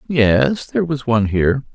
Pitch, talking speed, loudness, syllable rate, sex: 130 Hz, 170 wpm, -17 LUFS, 5.3 syllables/s, male